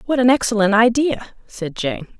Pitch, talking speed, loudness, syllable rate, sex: 230 Hz, 165 wpm, -17 LUFS, 4.7 syllables/s, female